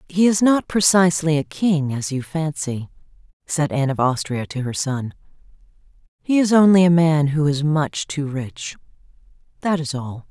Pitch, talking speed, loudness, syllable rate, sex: 155 Hz, 165 wpm, -19 LUFS, 4.7 syllables/s, female